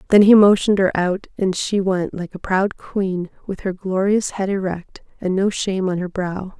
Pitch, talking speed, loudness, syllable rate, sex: 190 Hz, 210 wpm, -19 LUFS, 4.8 syllables/s, female